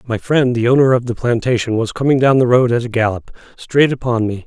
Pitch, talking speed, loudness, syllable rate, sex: 120 Hz, 240 wpm, -15 LUFS, 5.8 syllables/s, male